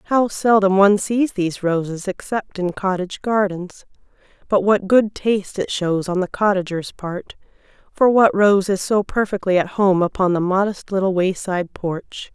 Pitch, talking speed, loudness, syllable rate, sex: 195 Hz, 165 wpm, -19 LUFS, 4.8 syllables/s, female